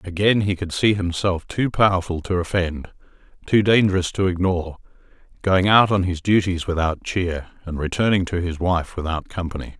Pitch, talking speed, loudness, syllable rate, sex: 90 Hz, 165 wpm, -21 LUFS, 5.2 syllables/s, male